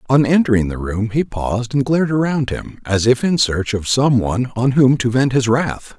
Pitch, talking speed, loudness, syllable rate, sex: 125 Hz, 230 wpm, -17 LUFS, 5.1 syllables/s, male